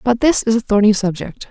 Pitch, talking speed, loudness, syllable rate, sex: 220 Hz, 240 wpm, -15 LUFS, 5.8 syllables/s, female